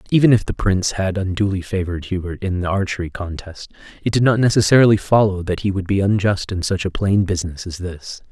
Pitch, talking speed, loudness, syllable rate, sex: 95 Hz, 210 wpm, -19 LUFS, 6.1 syllables/s, male